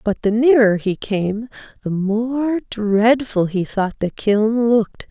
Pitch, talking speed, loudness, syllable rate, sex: 220 Hz, 155 wpm, -18 LUFS, 3.6 syllables/s, female